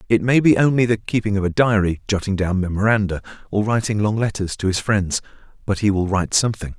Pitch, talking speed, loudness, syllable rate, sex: 105 Hz, 210 wpm, -19 LUFS, 6.2 syllables/s, male